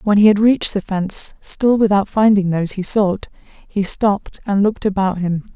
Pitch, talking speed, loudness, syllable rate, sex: 200 Hz, 195 wpm, -17 LUFS, 5.3 syllables/s, female